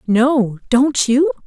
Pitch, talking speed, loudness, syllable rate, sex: 245 Hz, 125 wpm, -15 LUFS, 2.8 syllables/s, female